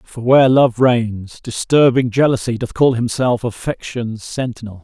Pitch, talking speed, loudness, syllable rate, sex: 120 Hz, 135 wpm, -16 LUFS, 4.4 syllables/s, male